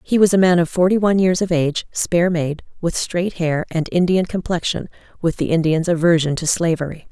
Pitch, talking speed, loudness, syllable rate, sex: 170 Hz, 200 wpm, -18 LUFS, 5.6 syllables/s, female